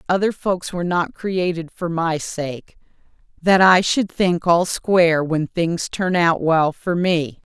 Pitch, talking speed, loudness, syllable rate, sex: 175 Hz, 165 wpm, -19 LUFS, 3.8 syllables/s, female